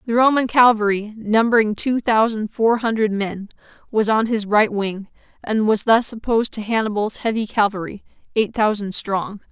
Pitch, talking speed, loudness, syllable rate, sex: 215 Hz, 160 wpm, -19 LUFS, 4.9 syllables/s, female